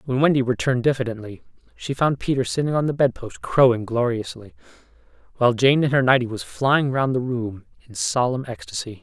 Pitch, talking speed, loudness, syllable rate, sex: 120 Hz, 180 wpm, -21 LUFS, 5.8 syllables/s, male